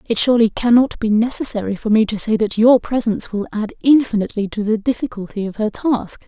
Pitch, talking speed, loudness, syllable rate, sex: 225 Hz, 200 wpm, -17 LUFS, 6.0 syllables/s, female